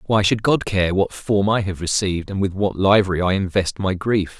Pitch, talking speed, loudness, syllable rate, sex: 100 Hz, 230 wpm, -19 LUFS, 5.2 syllables/s, male